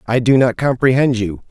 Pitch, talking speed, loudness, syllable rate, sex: 125 Hz, 200 wpm, -15 LUFS, 5.3 syllables/s, male